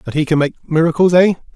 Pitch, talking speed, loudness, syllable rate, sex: 160 Hz, 230 wpm, -14 LUFS, 6.1 syllables/s, male